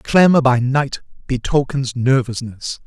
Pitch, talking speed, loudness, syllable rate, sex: 130 Hz, 105 wpm, -17 LUFS, 4.0 syllables/s, male